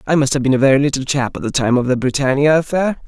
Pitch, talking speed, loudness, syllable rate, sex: 135 Hz, 295 wpm, -16 LUFS, 7.0 syllables/s, male